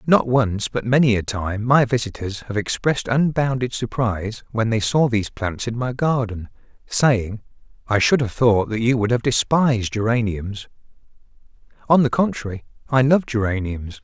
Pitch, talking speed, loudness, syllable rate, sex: 115 Hz, 160 wpm, -20 LUFS, 4.8 syllables/s, male